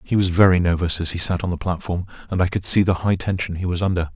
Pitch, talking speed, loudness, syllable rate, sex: 90 Hz, 290 wpm, -20 LUFS, 6.6 syllables/s, male